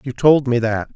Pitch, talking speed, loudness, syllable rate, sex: 125 Hz, 250 wpm, -17 LUFS, 4.9 syllables/s, male